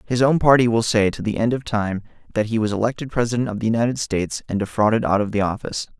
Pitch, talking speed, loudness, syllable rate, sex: 110 Hz, 250 wpm, -20 LUFS, 6.9 syllables/s, male